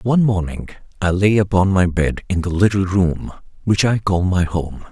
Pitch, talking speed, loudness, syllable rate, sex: 95 Hz, 195 wpm, -18 LUFS, 4.9 syllables/s, male